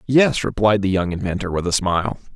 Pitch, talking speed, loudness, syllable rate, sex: 100 Hz, 205 wpm, -19 LUFS, 5.9 syllables/s, male